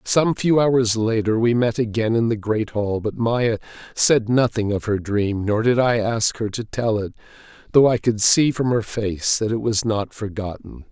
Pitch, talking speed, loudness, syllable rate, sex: 110 Hz, 210 wpm, -20 LUFS, 4.4 syllables/s, male